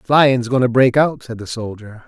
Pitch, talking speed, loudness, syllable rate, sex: 120 Hz, 230 wpm, -16 LUFS, 4.4 syllables/s, male